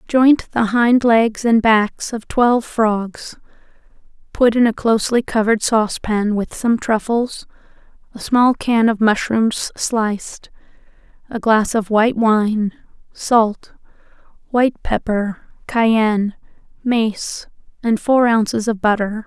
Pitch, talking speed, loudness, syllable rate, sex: 225 Hz, 120 wpm, -17 LUFS, 3.8 syllables/s, female